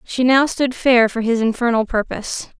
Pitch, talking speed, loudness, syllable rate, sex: 240 Hz, 185 wpm, -17 LUFS, 5.0 syllables/s, female